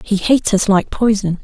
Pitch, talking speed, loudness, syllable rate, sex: 205 Hz, 210 wpm, -15 LUFS, 5.3 syllables/s, female